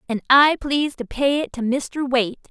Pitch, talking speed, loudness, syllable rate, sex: 265 Hz, 215 wpm, -19 LUFS, 5.2 syllables/s, female